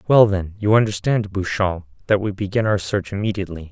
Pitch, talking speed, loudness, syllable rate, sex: 100 Hz, 180 wpm, -20 LUFS, 5.7 syllables/s, male